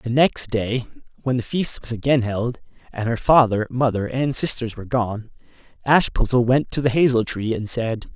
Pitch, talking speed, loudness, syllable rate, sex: 120 Hz, 185 wpm, -20 LUFS, 4.9 syllables/s, male